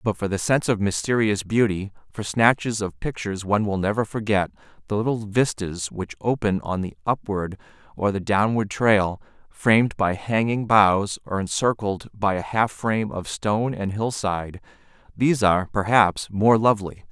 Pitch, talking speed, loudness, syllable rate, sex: 105 Hz, 160 wpm, -22 LUFS, 5.0 syllables/s, male